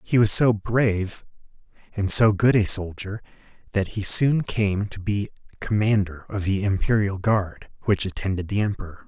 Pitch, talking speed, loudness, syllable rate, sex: 100 Hz, 160 wpm, -22 LUFS, 4.7 syllables/s, male